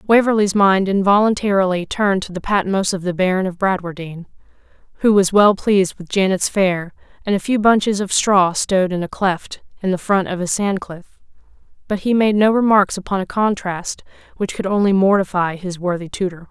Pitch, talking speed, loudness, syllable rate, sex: 190 Hz, 185 wpm, -17 LUFS, 5.4 syllables/s, female